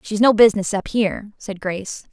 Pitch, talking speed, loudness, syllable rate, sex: 205 Hz, 200 wpm, -18 LUFS, 5.9 syllables/s, female